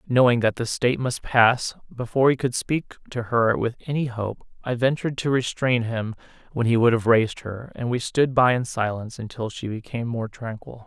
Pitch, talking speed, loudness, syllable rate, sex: 120 Hz, 205 wpm, -23 LUFS, 5.3 syllables/s, male